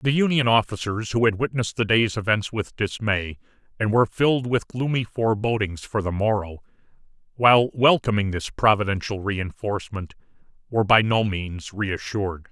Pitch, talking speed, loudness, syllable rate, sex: 105 Hz, 145 wpm, -22 LUFS, 5.2 syllables/s, male